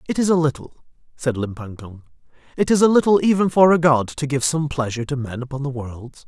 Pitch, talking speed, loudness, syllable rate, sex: 140 Hz, 230 wpm, -19 LUFS, 5.9 syllables/s, male